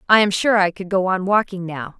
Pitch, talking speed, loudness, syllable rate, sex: 190 Hz, 270 wpm, -19 LUFS, 5.6 syllables/s, female